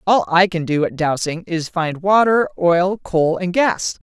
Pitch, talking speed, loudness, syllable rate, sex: 175 Hz, 190 wpm, -17 LUFS, 4.1 syllables/s, female